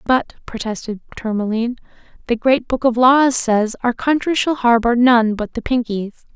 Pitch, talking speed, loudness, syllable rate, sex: 240 Hz, 160 wpm, -17 LUFS, 4.8 syllables/s, female